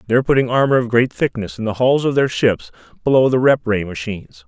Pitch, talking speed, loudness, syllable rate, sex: 120 Hz, 230 wpm, -17 LUFS, 6.1 syllables/s, male